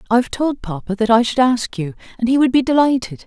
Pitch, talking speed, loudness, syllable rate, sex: 240 Hz, 255 wpm, -17 LUFS, 6.1 syllables/s, female